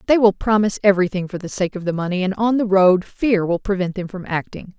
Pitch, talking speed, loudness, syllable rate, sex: 195 Hz, 250 wpm, -19 LUFS, 6.1 syllables/s, female